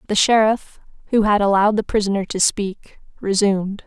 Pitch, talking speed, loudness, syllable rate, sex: 205 Hz, 155 wpm, -18 LUFS, 5.4 syllables/s, female